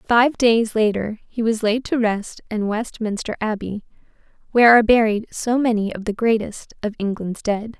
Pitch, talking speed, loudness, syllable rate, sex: 220 Hz, 170 wpm, -20 LUFS, 4.7 syllables/s, female